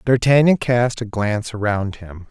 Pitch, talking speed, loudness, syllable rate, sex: 115 Hz, 155 wpm, -18 LUFS, 4.6 syllables/s, male